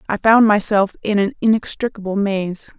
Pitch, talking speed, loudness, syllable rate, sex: 205 Hz, 150 wpm, -17 LUFS, 4.9 syllables/s, female